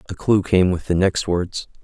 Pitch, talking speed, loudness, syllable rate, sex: 90 Hz, 230 wpm, -19 LUFS, 4.6 syllables/s, male